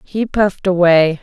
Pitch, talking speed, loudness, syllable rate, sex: 185 Hz, 145 wpm, -14 LUFS, 4.5 syllables/s, female